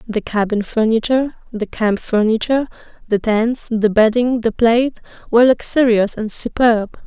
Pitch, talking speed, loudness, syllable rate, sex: 230 Hz, 135 wpm, -16 LUFS, 4.8 syllables/s, female